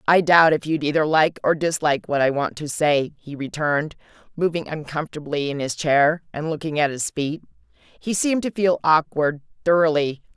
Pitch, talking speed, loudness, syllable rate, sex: 155 Hz, 175 wpm, -21 LUFS, 5.4 syllables/s, female